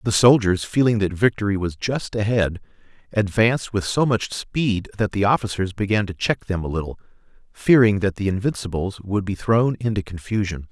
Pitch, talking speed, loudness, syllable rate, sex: 105 Hz, 175 wpm, -21 LUFS, 5.2 syllables/s, male